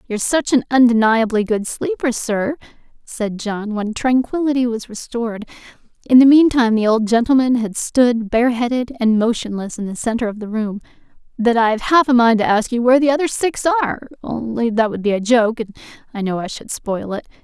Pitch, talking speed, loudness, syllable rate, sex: 235 Hz, 195 wpm, -17 LUFS, 3.9 syllables/s, female